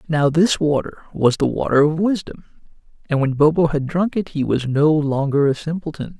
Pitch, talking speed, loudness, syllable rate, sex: 150 Hz, 195 wpm, -19 LUFS, 5.2 syllables/s, male